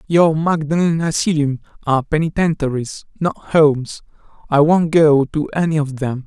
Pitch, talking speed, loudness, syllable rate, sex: 155 Hz, 135 wpm, -17 LUFS, 4.7 syllables/s, male